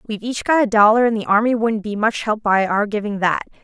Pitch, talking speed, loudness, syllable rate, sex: 215 Hz, 265 wpm, -18 LUFS, 6.2 syllables/s, female